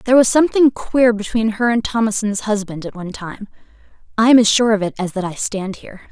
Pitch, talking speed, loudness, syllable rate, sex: 215 Hz, 215 wpm, -17 LUFS, 6.1 syllables/s, female